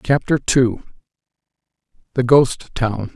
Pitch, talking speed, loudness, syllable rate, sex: 125 Hz, 95 wpm, -18 LUFS, 3.5 syllables/s, male